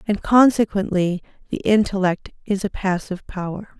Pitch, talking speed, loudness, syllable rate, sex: 195 Hz, 125 wpm, -20 LUFS, 4.9 syllables/s, female